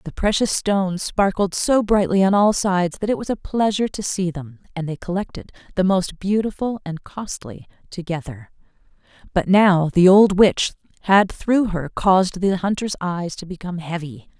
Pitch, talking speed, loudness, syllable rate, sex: 185 Hz, 170 wpm, -20 LUFS, 4.9 syllables/s, female